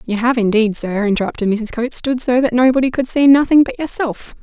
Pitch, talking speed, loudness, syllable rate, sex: 240 Hz, 215 wpm, -15 LUFS, 5.8 syllables/s, female